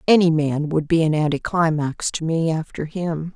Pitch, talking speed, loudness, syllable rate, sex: 160 Hz, 180 wpm, -21 LUFS, 4.7 syllables/s, female